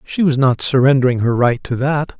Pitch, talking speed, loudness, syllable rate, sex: 135 Hz, 220 wpm, -15 LUFS, 5.3 syllables/s, male